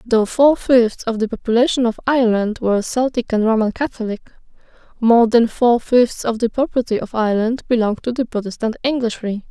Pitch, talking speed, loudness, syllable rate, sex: 230 Hz, 170 wpm, -17 LUFS, 5.5 syllables/s, female